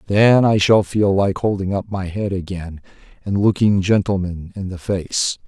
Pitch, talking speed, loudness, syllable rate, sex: 95 Hz, 175 wpm, -18 LUFS, 4.4 syllables/s, male